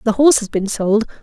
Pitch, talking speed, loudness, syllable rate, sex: 225 Hz, 245 wpm, -16 LUFS, 6.3 syllables/s, female